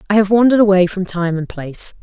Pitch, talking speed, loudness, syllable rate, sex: 195 Hz, 235 wpm, -15 LUFS, 6.7 syllables/s, female